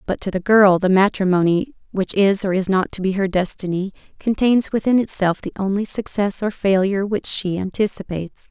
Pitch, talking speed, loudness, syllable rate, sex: 195 Hz, 185 wpm, -19 LUFS, 5.4 syllables/s, female